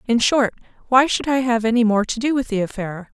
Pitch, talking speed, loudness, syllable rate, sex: 235 Hz, 245 wpm, -19 LUFS, 5.7 syllables/s, female